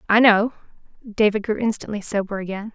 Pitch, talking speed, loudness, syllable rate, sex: 210 Hz, 155 wpm, -21 LUFS, 5.7 syllables/s, female